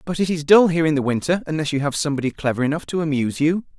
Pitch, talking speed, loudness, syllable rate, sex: 155 Hz, 270 wpm, -20 LUFS, 7.6 syllables/s, male